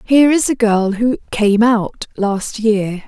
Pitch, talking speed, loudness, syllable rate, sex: 220 Hz, 175 wpm, -15 LUFS, 3.6 syllables/s, female